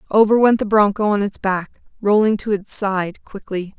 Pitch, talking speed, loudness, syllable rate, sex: 205 Hz, 190 wpm, -18 LUFS, 4.8 syllables/s, female